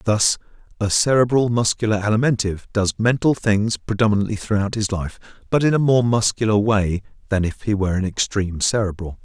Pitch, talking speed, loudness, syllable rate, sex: 105 Hz, 160 wpm, -20 LUFS, 5.8 syllables/s, male